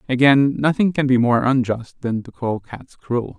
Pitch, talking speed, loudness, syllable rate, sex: 130 Hz, 195 wpm, -19 LUFS, 4.4 syllables/s, male